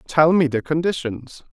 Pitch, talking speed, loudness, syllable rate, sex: 150 Hz, 155 wpm, -19 LUFS, 4.6 syllables/s, male